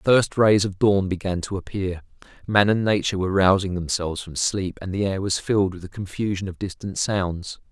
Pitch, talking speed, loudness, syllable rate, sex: 95 Hz, 210 wpm, -23 LUFS, 5.5 syllables/s, male